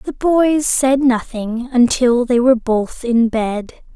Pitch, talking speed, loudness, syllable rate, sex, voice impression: 245 Hz, 150 wpm, -15 LUFS, 3.4 syllables/s, female, feminine, young, clear, very cute, slightly friendly, slightly lively